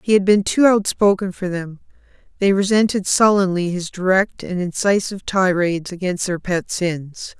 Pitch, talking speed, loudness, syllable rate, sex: 190 Hz, 155 wpm, -18 LUFS, 4.8 syllables/s, female